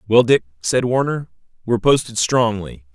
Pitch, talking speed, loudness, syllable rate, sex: 110 Hz, 145 wpm, -18 LUFS, 5.0 syllables/s, male